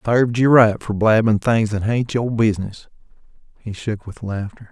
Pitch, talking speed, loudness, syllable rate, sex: 110 Hz, 180 wpm, -18 LUFS, 4.9 syllables/s, male